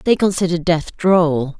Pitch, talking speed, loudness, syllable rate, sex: 170 Hz, 150 wpm, -17 LUFS, 4.6 syllables/s, female